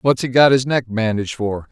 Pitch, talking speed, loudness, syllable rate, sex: 120 Hz, 245 wpm, -17 LUFS, 5.4 syllables/s, male